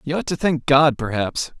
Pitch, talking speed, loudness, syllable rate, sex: 140 Hz, 225 wpm, -19 LUFS, 4.8 syllables/s, male